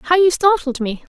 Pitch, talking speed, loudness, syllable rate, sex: 320 Hz, 210 wpm, -17 LUFS, 4.8 syllables/s, female